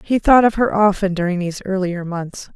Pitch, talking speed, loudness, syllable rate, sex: 190 Hz, 210 wpm, -17 LUFS, 5.4 syllables/s, female